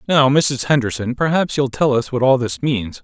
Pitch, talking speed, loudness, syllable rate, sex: 130 Hz, 215 wpm, -17 LUFS, 4.9 syllables/s, male